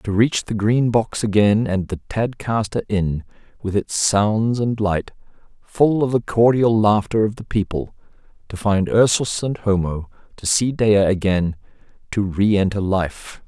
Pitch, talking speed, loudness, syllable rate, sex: 105 Hz, 150 wpm, -19 LUFS, 4.1 syllables/s, male